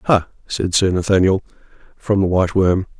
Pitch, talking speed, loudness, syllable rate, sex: 95 Hz, 160 wpm, -17 LUFS, 5.3 syllables/s, male